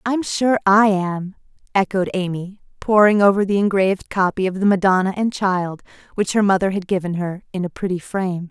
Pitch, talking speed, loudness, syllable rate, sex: 195 Hz, 185 wpm, -19 LUFS, 5.3 syllables/s, female